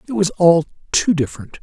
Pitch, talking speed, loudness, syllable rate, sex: 170 Hz, 185 wpm, -17 LUFS, 8.1 syllables/s, male